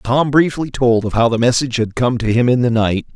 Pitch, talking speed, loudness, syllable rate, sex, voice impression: 120 Hz, 265 wpm, -15 LUFS, 5.6 syllables/s, male, masculine, adult-like, tensed, powerful, clear, cool, sincere, slightly friendly, wild, lively, slightly strict